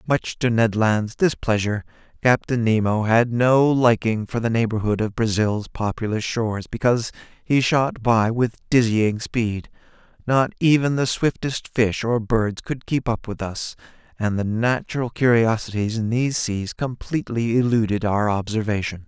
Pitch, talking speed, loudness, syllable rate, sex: 115 Hz, 150 wpm, -21 LUFS, 4.6 syllables/s, male